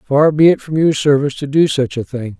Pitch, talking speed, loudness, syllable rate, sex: 145 Hz, 275 wpm, -14 LUFS, 5.4 syllables/s, male